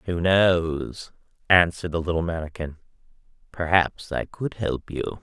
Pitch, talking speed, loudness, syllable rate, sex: 85 Hz, 125 wpm, -23 LUFS, 4.3 syllables/s, male